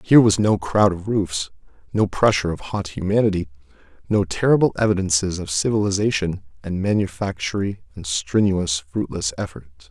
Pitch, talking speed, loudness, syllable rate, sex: 95 Hz, 135 wpm, -21 LUFS, 5.2 syllables/s, male